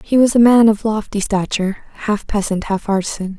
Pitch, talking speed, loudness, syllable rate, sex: 210 Hz, 195 wpm, -16 LUFS, 5.5 syllables/s, female